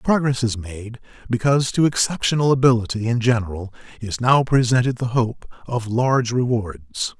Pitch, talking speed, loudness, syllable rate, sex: 120 Hz, 140 wpm, -20 LUFS, 5.0 syllables/s, male